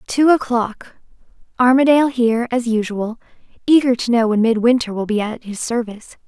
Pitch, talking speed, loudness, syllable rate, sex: 235 Hz, 145 wpm, -17 LUFS, 5.5 syllables/s, female